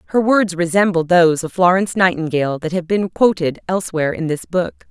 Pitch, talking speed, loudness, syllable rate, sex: 175 Hz, 185 wpm, -17 LUFS, 6.0 syllables/s, female